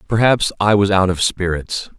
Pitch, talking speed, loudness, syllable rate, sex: 100 Hz, 180 wpm, -16 LUFS, 4.8 syllables/s, male